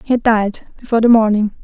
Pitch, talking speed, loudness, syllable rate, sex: 220 Hz, 185 wpm, -14 LUFS, 5.9 syllables/s, female